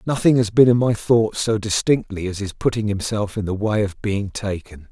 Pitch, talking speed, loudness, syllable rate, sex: 105 Hz, 220 wpm, -20 LUFS, 5.1 syllables/s, male